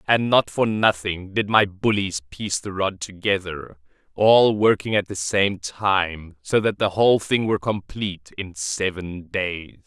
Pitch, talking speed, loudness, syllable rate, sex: 95 Hz, 165 wpm, -21 LUFS, 4.1 syllables/s, male